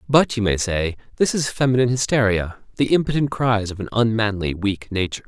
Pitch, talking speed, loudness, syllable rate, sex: 110 Hz, 180 wpm, -20 LUFS, 5.8 syllables/s, male